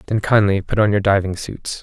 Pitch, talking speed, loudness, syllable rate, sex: 100 Hz, 230 wpm, -18 LUFS, 5.5 syllables/s, male